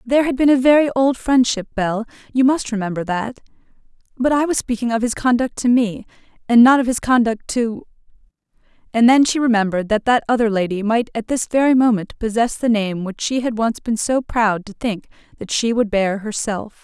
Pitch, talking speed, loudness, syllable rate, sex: 230 Hz, 205 wpm, -18 LUFS, 5.5 syllables/s, female